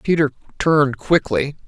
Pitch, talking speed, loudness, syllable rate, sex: 140 Hz, 110 wpm, -18 LUFS, 4.9 syllables/s, male